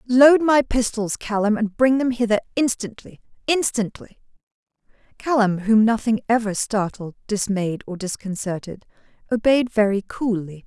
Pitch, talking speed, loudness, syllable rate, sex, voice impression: 220 Hz, 120 wpm, -21 LUFS, 5.0 syllables/s, female, feminine, adult-like, relaxed, slightly powerful, hard, clear, fluent, slightly raspy, intellectual, calm, slightly friendly, reassuring, elegant, slightly lively, slightly kind